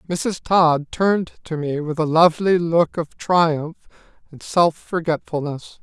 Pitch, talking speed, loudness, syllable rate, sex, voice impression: 165 Hz, 145 wpm, -20 LUFS, 4.0 syllables/s, male, masculine, adult-like, slightly bright, refreshing, unique, slightly kind